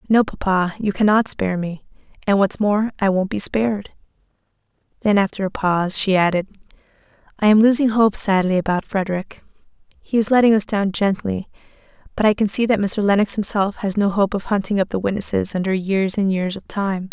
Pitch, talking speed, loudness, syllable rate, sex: 200 Hz, 190 wpm, -19 LUFS, 5.6 syllables/s, female